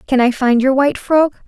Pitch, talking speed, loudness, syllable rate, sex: 265 Hz, 245 wpm, -14 LUFS, 5.7 syllables/s, female